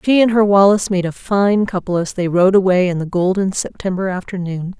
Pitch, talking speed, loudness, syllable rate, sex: 190 Hz, 215 wpm, -16 LUFS, 5.6 syllables/s, female